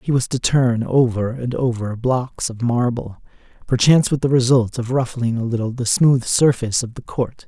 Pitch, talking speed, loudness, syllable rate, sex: 125 Hz, 195 wpm, -19 LUFS, 4.9 syllables/s, male